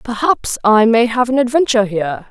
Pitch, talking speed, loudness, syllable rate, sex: 235 Hz, 180 wpm, -14 LUFS, 5.6 syllables/s, female